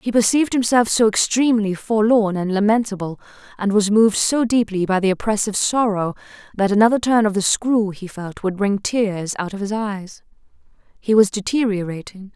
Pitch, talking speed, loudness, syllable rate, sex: 210 Hz, 170 wpm, -18 LUFS, 5.3 syllables/s, female